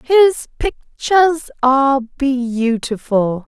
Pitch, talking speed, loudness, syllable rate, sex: 270 Hz, 65 wpm, -16 LUFS, 4.3 syllables/s, female